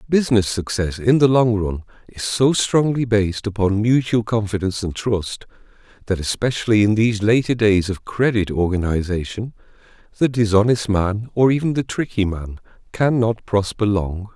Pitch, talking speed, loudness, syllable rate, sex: 105 Hz, 145 wpm, -19 LUFS, 5.0 syllables/s, male